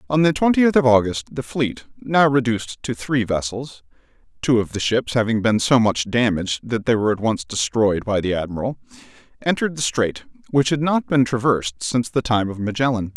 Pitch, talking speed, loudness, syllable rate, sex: 120 Hz, 185 wpm, -20 LUFS, 5.5 syllables/s, male